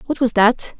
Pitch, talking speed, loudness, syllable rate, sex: 235 Hz, 225 wpm, -16 LUFS, 4.8 syllables/s, female